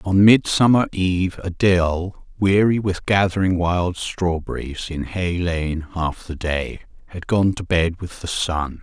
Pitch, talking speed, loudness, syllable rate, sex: 90 Hz, 150 wpm, -20 LUFS, 4.0 syllables/s, male